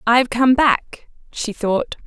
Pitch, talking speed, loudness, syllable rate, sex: 245 Hz, 175 wpm, -18 LUFS, 4.0 syllables/s, female